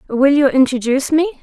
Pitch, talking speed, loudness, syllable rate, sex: 275 Hz, 170 wpm, -14 LUFS, 5.6 syllables/s, female